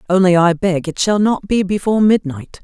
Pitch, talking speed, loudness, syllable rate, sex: 190 Hz, 205 wpm, -15 LUFS, 5.4 syllables/s, female